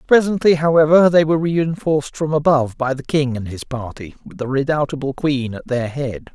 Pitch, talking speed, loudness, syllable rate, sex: 145 Hz, 190 wpm, -18 LUFS, 5.4 syllables/s, male